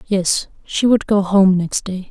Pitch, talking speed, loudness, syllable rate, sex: 195 Hz, 200 wpm, -16 LUFS, 3.8 syllables/s, female